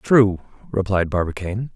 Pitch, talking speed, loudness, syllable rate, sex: 100 Hz, 105 wpm, -21 LUFS, 5.0 syllables/s, male